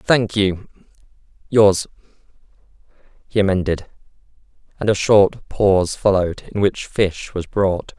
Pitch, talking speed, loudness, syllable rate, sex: 100 Hz, 105 wpm, -18 LUFS, 4.1 syllables/s, male